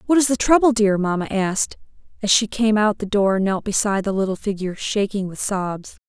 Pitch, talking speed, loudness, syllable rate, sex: 205 Hz, 215 wpm, -20 LUFS, 5.7 syllables/s, female